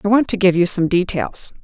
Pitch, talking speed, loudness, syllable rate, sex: 190 Hz, 255 wpm, -17 LUFS, 5.5 syllables/s, female